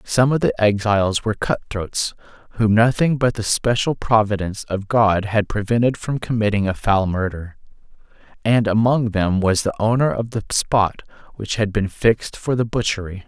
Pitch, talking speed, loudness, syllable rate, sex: 105 Hz, 165 wpm, -19 LUFS, 4.9 syllables/s, male